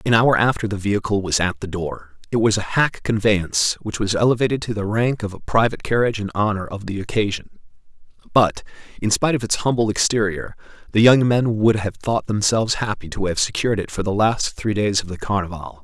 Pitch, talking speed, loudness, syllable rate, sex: 105 Hz, 210 wpm, -20 LUFS, 5.9 syllables/s, male